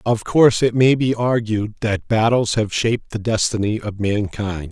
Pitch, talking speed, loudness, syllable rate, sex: 110 Hz, 180 wpm, -18 LUFS, 4.7 syllables/s, male